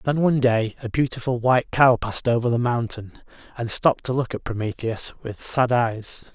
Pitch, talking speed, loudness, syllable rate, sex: 120 Hz, 190 wpm, -22 LUFS, 5.3 syllables/s, male